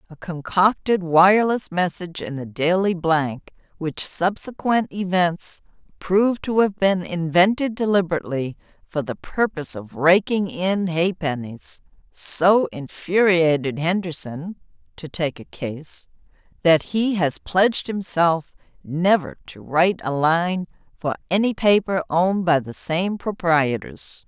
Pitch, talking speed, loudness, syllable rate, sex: 175 Hz, 120 wpm, -21 LUFS, 4.1 syllables/s, female